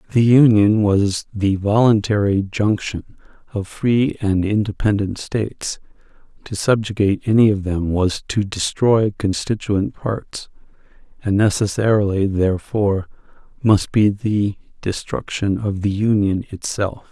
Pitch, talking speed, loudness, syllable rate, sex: 105 Hz, 110 wpm, -19 LUFS, 4.2 syllables/s, male